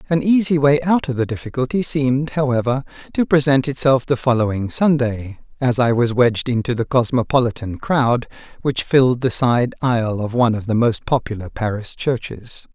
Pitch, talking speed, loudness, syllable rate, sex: 125 Hz, 170 wpm, -18 LUFS, 5.3 syllables/s, male